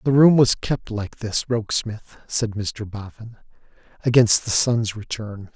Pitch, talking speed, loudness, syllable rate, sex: 110 Hz, 150 wpm, -21 LUFS, 4.1 syllables/s, male